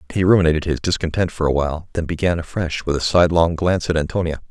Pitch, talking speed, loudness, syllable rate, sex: 85 Hz, 215 wpm, -19 LUFS, 7.0 syllables/s, male